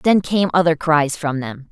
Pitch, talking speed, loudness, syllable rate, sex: 160 Hz, 210 wpm, -18 LUFS, 4.3 syllables/s, female